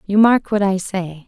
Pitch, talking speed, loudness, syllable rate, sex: 195 Hz, 235 wpm, -17 LUFS, 4.3 syllables/s, female